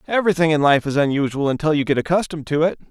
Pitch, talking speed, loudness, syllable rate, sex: 155 Hz, 225 wpm, -19 LUFS, 7.6 syllables/s, male